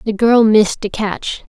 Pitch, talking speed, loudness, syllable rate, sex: 215 Hz, 190 wpm, -15 LUFS, 4.4 syllables/s, female